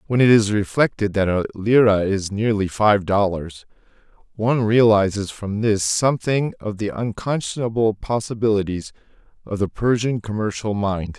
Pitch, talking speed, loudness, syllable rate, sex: 105 Hz, 135 wpm, -20 LUFS, 4.8 syllables/s, male